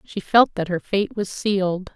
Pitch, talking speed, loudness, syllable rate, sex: 190 Hz, 215 wpm, -21 LUFS, 4.3 syllables/s, female